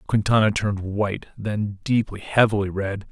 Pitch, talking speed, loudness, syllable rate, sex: 105 Hz, 135 wpm, -22 LUFS, 5.0 syllables/s, male